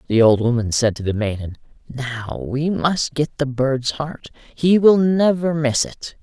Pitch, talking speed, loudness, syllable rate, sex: 135 Hz, 185 wpm, -19 LUFS, 4.0 syllables/s, male